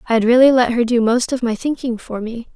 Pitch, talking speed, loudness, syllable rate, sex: 240 Hz, 280 wpm, -16 LUFS, 6.0 syllables/s, female